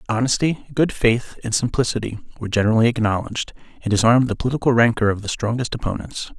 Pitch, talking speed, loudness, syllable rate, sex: 115 Hz, 170 wpm, -20 LUFS, 7.0 syllables/s, male